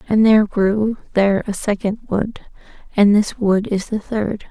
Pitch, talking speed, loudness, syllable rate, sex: 210 Hz, 175 wpm, -18 LUFS, 4.5 syllables/s, female